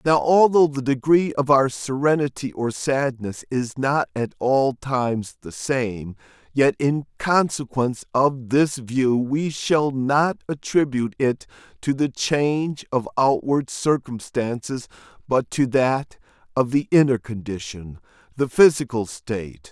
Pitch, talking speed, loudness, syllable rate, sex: 135 Hz, 130 wpm, -21 LUFS, 4.0 syllables/s, male